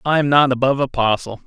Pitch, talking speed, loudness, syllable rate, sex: 130 Hz, 245 wpm, -17 LUFS, 6.7 syllables/s, male